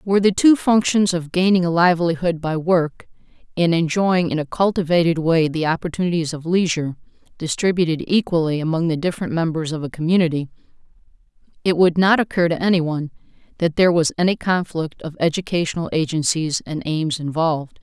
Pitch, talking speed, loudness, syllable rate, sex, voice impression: 170 Hz, 160 wpm, -19 LUFS, 5.9 syllables/s, female, very feminine, slightly gender-neutral, very adult-like, slightly thin, very tensed, powerful, slightly dark, slightly soft, clear, fluent, slightly raspy, slightly cute, cool, very intellectual, refreshing, slightly sincere, calm, very friendly, reassuring, unique, elegant, slightly wild, slightly sweet, lively, strict, slightly intense, slightly sharp, slightly light